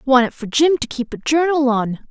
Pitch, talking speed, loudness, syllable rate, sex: 270 Hz, 255 wpm, -18 LUFS, 5.2 syllables/s, female